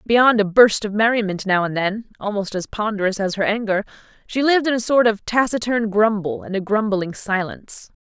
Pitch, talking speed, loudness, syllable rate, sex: 210 Hz, 195 wpm, -19 LUFS, 5.3 syllables/s, female